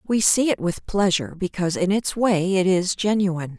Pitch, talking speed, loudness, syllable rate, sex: 190 Hz, 200 wpm, -21 LUFS, 5.2 syllables/s, female